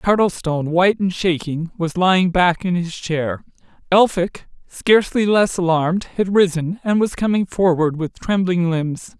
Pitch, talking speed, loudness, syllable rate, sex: 180 Hz, 150 wpm, -18 LUFS, 4.5 syllables/s, male